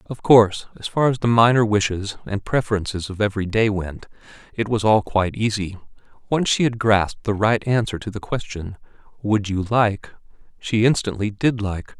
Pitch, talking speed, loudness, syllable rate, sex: 105 Hz, 180 wpm, -20 LUFS, 5.3 syllables/s, male